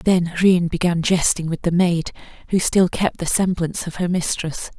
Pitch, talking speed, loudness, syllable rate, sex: 175 Hz, 190 wpm, -19 LUFS, 4.7 syllables/s, female